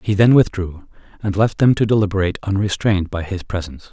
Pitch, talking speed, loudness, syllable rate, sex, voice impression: 100 Hz, 185 wpm, -18 LUFS, 6.3 syllables/s, male, masculine, adult-like, slightly thick, tensed, slightly powerful, slightly soft, raspy, cool, intellectual, calm, slightly mature, reassuring, wild, lively, kind